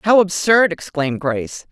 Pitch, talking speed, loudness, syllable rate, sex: 170 Hz, 140 wpm, -17 LUFS, 5.1 syllables/s, female